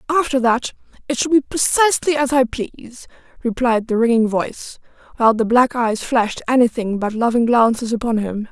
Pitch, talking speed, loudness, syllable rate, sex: 245 Hz, 170 wpm, -17 LUFS, 5.7 syllables/s, female